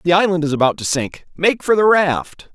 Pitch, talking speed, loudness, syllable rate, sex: 165 Hz, 235 wpm, -16 LUFS, 5.2 syllables/s, male